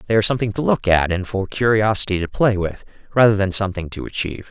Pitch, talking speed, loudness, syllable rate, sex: 100 Hz, 225 wpm, -19 LUFS, 7.0 syllables/s, male